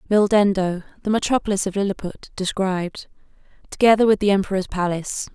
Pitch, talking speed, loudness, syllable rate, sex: 195 Hz, 125 wpm, -20 LUFS, 6.1 syllables/s, female